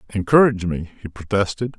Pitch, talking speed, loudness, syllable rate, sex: 100 Hz, 135 wpm, -19 LUFS, 6.9 syllables/s, male